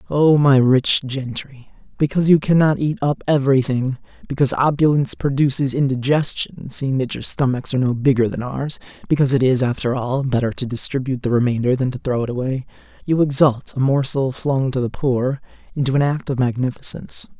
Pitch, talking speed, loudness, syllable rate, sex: 135 Hz, 175 wpm, -19 LUFS, 5.7 syllables/s, male